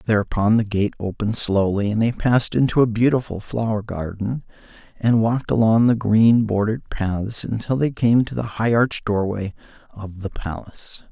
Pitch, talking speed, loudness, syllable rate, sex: 110 Hz, 165 wpm, -20 LUFS, 5.2 syllables/s, male